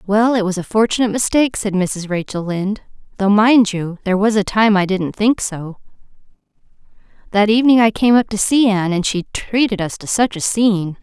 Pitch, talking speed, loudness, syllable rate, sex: 205 Hz, 195 wpm, -16 LUFS, 5.7 syllables/s, female